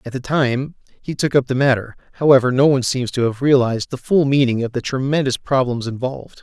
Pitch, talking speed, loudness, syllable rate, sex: 130 Hz, 215 wpm, -18 LUFS, 5.9 syllables/s, male